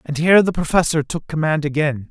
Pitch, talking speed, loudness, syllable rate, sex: 155 Hz, 200 wpm, -18 LUFS, 6.0 syllables/s, male